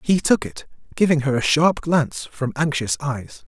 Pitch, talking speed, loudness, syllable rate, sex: 145 Hz, 185 wpm, -20 LUFS, 4.6 syllables/s, male